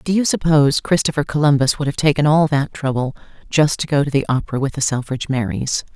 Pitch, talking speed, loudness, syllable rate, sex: 140 Hz, 210 wpm, -18 LUFS, 6.2 syllables/s, female